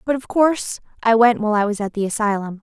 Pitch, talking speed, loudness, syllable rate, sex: 225 Hz, 245 wpm, -19 LUFS, 6.6 syllables/s, female